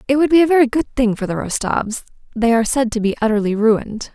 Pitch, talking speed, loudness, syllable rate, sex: 240 Hz, 245 wpm, -17 LUFS, 6.3 syllables/s, female